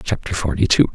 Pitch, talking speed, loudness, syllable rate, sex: 80 Hz, 190 wpm, -19 LUFS, 5.9 syllables/s, male